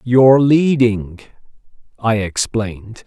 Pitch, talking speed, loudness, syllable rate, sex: 115 Hz, 80 wpm, -15 LUFS, 3.7 syllables/s, male